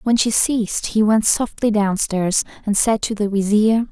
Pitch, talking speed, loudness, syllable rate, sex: 215 Hz, 185 wpm, -18 LUFS, 4.5 syllables/s, female